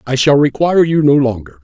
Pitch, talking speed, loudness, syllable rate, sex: 140 Hz, 220 wpm, -12 LUFS, 6.0 syllables/s, male